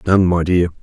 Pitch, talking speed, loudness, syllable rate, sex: 90 Hz, 220 wpm, -15 LUFS, 5.2 syllables/s, male